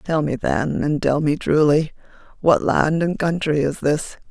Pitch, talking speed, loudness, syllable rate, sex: 150 Hz, 180 wpm, -19 LUFS, 4.1 syllables/s, female